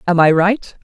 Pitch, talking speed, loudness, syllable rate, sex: 185 Hz, 215 wpm, -14 LUFS, 4.4 syllables/s, female